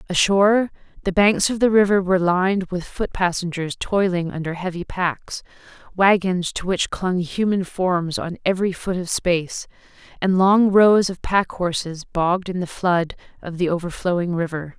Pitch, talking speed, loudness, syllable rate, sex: 185 Hz, 160 wpm, -20 LUFS, 4.8 syllables/s, female